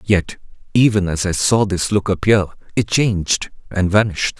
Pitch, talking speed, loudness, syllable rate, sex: 100 Hz, 165 wpm, -17 LUFS, 4.9 syllables/s, male